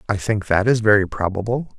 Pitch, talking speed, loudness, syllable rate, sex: 105 Hz, 200 wpm, -19 LUFS, 5.6 syllables/s, male